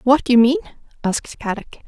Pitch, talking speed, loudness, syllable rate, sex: 235 Hz, 160 wpm, -19 LUFS, 6.5 syllables/s, female